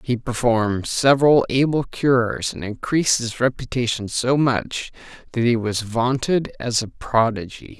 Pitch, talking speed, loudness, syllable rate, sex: 120 Hz, 140 wpm, -20 LUFS, 4.5 syllables/s, male